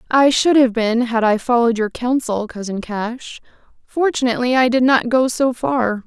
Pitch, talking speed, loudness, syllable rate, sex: 245 Hz, 180 wpm, -17 LUFS, 4.8 syllables/s, female